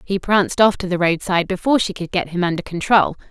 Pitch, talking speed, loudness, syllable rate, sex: 185 Hz, 235 wpm, -18 LUFS, 6.5 syllables/s, female